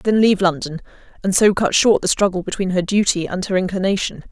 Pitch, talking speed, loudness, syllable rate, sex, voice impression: 190 Hz, 210 wpm, -18 LUFS, 6.2 syllables/s, female, feminine, adult-like, slightly powerful, slightly sincere, reassuring